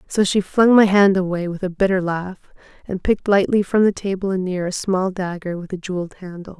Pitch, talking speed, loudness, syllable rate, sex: 190 Hz, 220 wpm, -19 LUFS, 5.5 syllables/s, female